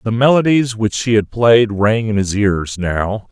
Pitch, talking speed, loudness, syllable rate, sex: 110 Hz, 200 wpm, -15 LUFS, 4.1 syllables/s, male